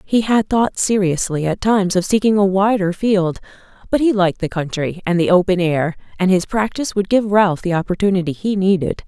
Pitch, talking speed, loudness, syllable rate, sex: 190 Hz, 200 wpm, -17 LUFS, 5.5 syllables/s, female